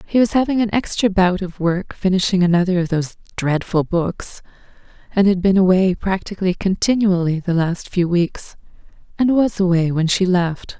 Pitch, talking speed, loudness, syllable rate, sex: 185 Hz, 165 wpm, -18 LUFS, 5.0 syllables/s, female